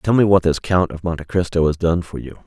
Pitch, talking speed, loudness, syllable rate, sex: 90 Hz, 290 wpm, -18 LUFS, 5.9 syllables/s, male